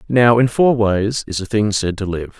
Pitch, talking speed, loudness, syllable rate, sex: 110 Hz, 250 wpm, -16 LUFS, 4.6 syllables/s, male